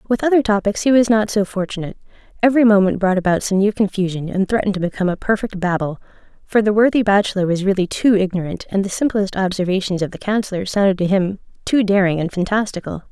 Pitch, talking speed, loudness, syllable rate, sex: 200 Hz, 200 wpm, -18 LUFS, 6.7 syllables/s, female